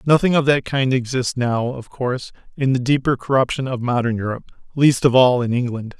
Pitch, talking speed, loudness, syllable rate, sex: 130 Hz, 190 wpm, -19 LUFS, 5.7 syllables/s, male